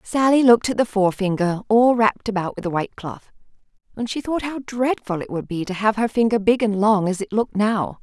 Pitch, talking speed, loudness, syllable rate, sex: 215 Hz, 230 wpm, -20 LUFS, 5.8 syllables/s, female